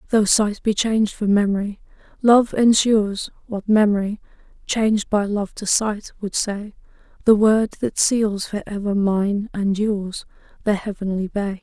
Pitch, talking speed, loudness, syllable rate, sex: 205 Hz, 150 wpm, -20 LUFS, 4.2 syllables/s, female